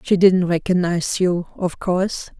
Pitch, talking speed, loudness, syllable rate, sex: 180 Hz, 150 wpm, -19 LUFS, 4.7 syllables/s, female